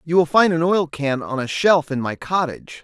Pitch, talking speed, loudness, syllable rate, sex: 160 Hz, 255 wpm, -19 LUFS, 5.1 syllables/s, male